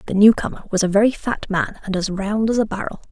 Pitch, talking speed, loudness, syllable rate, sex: 205 Hz, 270 wpm, -19 LUFS, 6.2 syllables/s, female